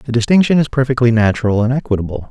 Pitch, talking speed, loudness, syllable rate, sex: 125 Hz, 180 wpm, -14 LUFS, 7.1 syllables/s, male